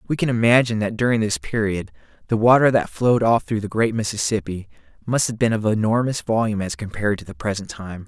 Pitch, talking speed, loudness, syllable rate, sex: 110 Hz, 210 wpm, -20 LUFS, 6.3 syllables/s, male